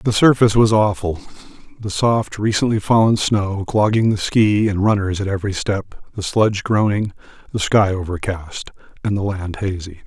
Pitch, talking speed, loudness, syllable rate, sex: 100 Hz, 160 wpm, -18 LUFS, 5.0 syllables/s, male